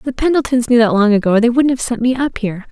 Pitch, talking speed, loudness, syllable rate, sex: 240 Hz, 310 wpm, -14 LUFS, 6.8 syllables/s, female